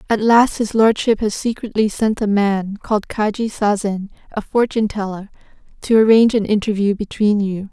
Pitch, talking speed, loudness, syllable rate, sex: 210 Hz, 165 wpm, -17 LUFS, 5.2 syllables/s, female